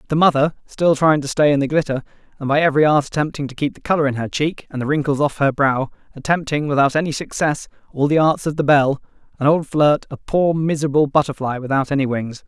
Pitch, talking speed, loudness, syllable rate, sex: 145 Hz, 220 wpm, -18 LUFS, 6.2 syllables/s, male